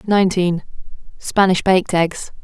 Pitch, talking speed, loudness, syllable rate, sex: 185 Hz, 75 wpm, -17 LUFS, 4.8 syllables/s, female